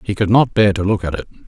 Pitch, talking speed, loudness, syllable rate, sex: 100 Hz, 325 wpm, -16 LUFS, 6.6 syllables/s, male